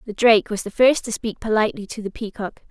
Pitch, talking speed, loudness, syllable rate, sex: 215 Hz, 245 wpm, -20 LUFS, 6.3 syllables/s, female